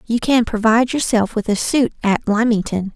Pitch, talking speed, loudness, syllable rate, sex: 225 Hz, 185 wpm, -17 LUFS, 5.2 syllables/s, female